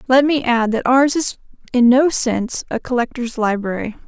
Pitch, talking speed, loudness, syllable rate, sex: 250 Hz, 175 wpm, -17 LUFS, 4.9 syllables/s, female